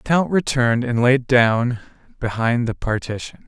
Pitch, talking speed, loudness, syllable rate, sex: 125 Hz, 155 wpm, -19 LUFS, 4.6 syllables/s, male